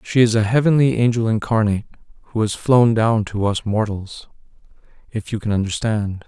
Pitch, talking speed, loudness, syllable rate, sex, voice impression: 110 Hz, 165 wpm, -19 LUFS, 5.4 syllables/s, male, masculine, adult-like, slightly thick, tensed, slightly powerful, hard, clear, cool, intellectual, slightly mature, wild, lively, slightly strict, slightly modest